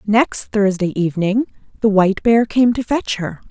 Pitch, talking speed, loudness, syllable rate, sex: 210 Hz, 170 wpm, -17 LUFS, 4.8 syllables/s, female